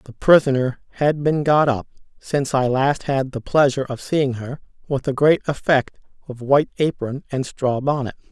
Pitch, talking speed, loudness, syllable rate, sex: 135 Hz, 180 wpm, -20 LUFS, 5.0 syllables/s, male